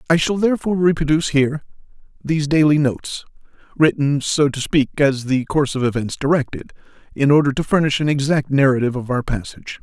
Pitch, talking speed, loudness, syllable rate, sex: 145 Hz, 170 wpm, -18 LUFS, 6.4 syllables/s, male